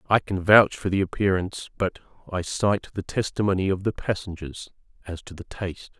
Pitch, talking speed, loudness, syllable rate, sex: 95 Hz, 180 wpm, -24 LUFS, 5.4 syllables/s, male